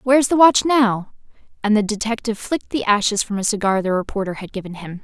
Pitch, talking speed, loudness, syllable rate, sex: 215 Hz, 215 wpm, -19 LUFS, 6.3 syllables/s, female